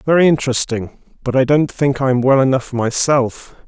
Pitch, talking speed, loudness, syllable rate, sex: 130 Hz, 165 wpm, -16 LUFS, 5.0 syllables/s, male